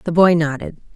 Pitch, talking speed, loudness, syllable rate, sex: 155 Hz, 190 wpm, -16 LUFS, 5.8 syllables/s, female